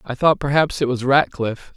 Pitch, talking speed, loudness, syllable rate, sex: 130 Hz, 205 wpm, -19 LUFS, 4.9 syllables/s, male